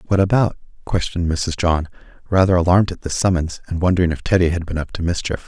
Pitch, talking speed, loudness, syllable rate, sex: 85 Hz, 210 wpm, -19 LUFS, 6.6 syllables/s, male